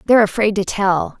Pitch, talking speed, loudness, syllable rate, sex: 200 Hz, 200 wpm, -17 LUFS, 5.9 syllables/s, female